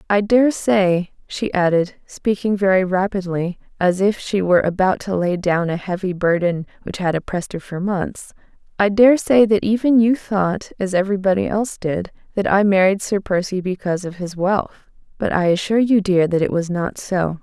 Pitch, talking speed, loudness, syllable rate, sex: 190 Hz, 170 wpm, -19 LUFS, 5.1 syllables/s, female